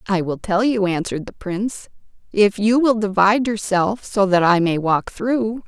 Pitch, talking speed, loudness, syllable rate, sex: 205 Hz, 190 wpm, -19 LUFS, 4.7 syllables/s, female